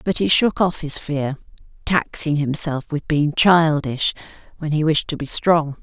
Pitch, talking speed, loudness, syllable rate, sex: 155 Hz, 175 wpm, -19 LUFS, 4.2 syllables/s, female